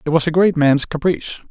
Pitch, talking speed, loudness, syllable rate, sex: 160 Hz, 240 wpm, -17 LUFS, 6.6 syllables/s, male